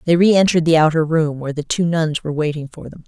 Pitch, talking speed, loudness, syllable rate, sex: 160 Hz, 255 wpm, -17 LUFS, 6.8 syllables/s, female